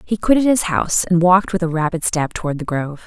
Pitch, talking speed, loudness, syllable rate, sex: 175 Hz, 255 wpm, -17 LUFS, 6.5 syllables/s, female